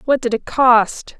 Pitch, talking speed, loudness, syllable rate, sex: 240 Hz, 200 wpm, -15 LUFS, 3.7 syllables/s, female